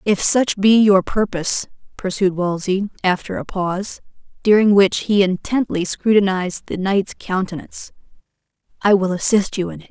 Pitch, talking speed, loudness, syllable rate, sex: 195 Hz, 145 wpm, -18 LUFS, 5.0 syllables/s, female